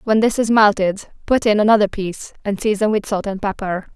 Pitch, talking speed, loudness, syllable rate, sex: 205 Hz, 210 wpm, -18 LUFS, 5.9 syllables/s, female